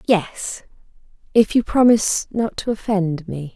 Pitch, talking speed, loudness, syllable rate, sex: 200 Hz, 135 wpm, -19 LUFS, 4.2 syllables/s, female